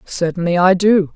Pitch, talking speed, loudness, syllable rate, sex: 185 Hz, 155 wpm, -15 LUFS, 4.8 syllables/s, female